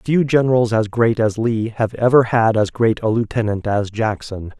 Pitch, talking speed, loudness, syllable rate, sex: 115 Hz, 195 wpm, -17 LUFS, 4.6 syllables/s, male